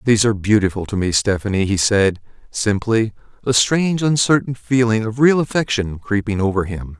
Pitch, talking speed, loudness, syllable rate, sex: 110 Hz, 165 wpm, -18 LUFS, 5.5 syllables/s, male